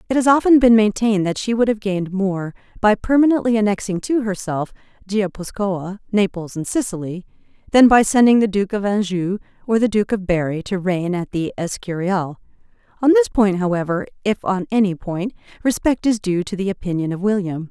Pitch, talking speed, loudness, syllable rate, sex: 200 Hz, 180 wpm, -19 LUFS, 5.4 syllables/s, female